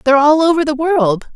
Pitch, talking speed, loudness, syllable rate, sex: 290 Hz, 220 wpm, -13 LUFS, 5.9 syllables/s, female